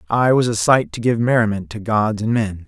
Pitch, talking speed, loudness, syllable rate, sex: 110 Hz, 245 wpm, -18 LUFS, 5.3 syllables/s, male